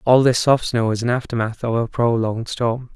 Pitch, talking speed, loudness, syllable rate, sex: 120 Hz, 225 wpm, -19 LUFS, 5.3 syllables/s, male